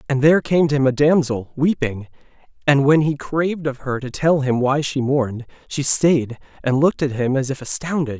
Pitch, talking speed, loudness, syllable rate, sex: 140 Hz, 210 wpm, -19 LUFS, 5.3 syllables/s, male